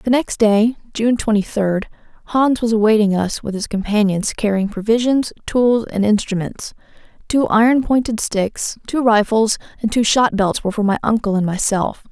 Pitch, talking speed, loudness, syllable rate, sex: 220 Hz, 170 wpm, -17 LUFS, 4.8 syllables/s, female